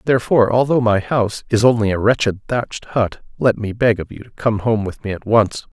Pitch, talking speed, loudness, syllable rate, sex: 110 Hz, 230 wpm, -18 LUFS, 5.6 syllables/s, male